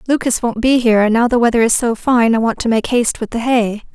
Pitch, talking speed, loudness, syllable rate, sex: 235 Hz, 290 wpm, -15 LUFS, 6.2 syllables/s, female